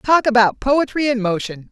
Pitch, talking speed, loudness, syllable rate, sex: 240 Hz, 175 wpm, -17 LUFS, 4.8 syllables/s, female